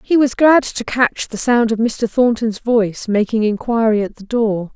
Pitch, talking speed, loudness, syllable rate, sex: 225 Hz, 200 wpm, -16 LUFS, 4.5 syllables/s, female